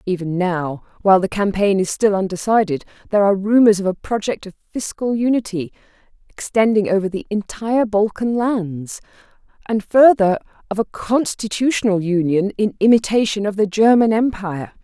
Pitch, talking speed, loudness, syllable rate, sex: 205 Hz, 140 wpm, -18 LUFS, 5.3 syllables/s, female